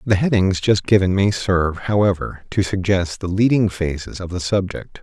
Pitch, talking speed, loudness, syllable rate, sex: 95 Hz, 180 wpm, -19 LUFS, 4.9 syllables/s, male